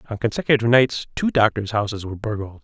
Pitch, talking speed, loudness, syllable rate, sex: 110 Hz, 180 wpm, -20 LUFS, 6.8 syllables/s, male